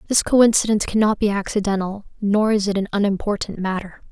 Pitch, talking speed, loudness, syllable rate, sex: 205 Hz, 160 wpm, -20 LUFS, 6.0 syllables/s, female